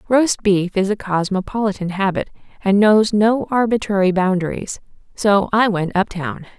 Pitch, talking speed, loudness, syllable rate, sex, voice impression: 200 Hz, 135 wpm, -18 LUFS, 4.7 syllables/s, female, feminine, adult-like, slightly tensed, intellectual, elegant